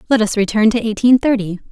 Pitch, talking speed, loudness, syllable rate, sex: 220 Hz, 210 wpm, -15 LUFS, 6.3 syllables/s, female